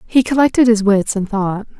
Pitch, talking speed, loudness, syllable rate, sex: 220 Hz, 200 wpm, -15 LUFS, 5.1 syllables/s, female